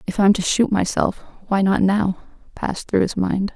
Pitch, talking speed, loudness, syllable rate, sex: 195 Hz, 205 wpm, -20 LUFS, 4.9 syllables/s, female